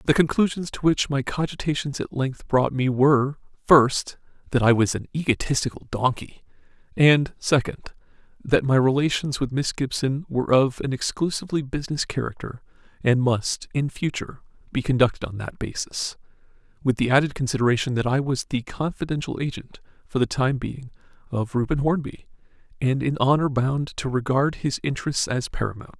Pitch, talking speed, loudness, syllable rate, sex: 135 Hz, 155 wpm, -23 LUFS, 5.4 syllables/s, male